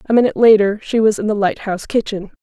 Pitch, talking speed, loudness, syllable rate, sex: 210 Hz, 220 wpm, -15 LUFS, 6.8 syllables/s, female